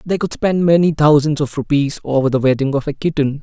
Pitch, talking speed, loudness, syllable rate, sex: 150 Hz, 230 wpm, -16 LUFS, 5.8 syllables/s, male